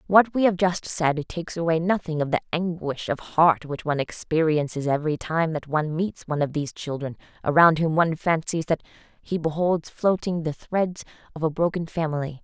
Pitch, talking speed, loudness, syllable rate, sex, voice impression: 160 Hz, 190 wpm, -24 LUFS, 5.5 syllables/s, female, feminine, very adult-like, slightly intellectual, calm, slightly elegant